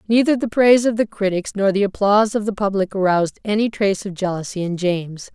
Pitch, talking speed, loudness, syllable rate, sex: 200 Hz, 215 wpm, -19 LUFS, 6.2 syllables/s, female